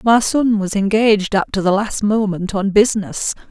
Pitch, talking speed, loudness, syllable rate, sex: 205 Hz, 190 wpm, -16 LUFS, 4.9 syllables/s, female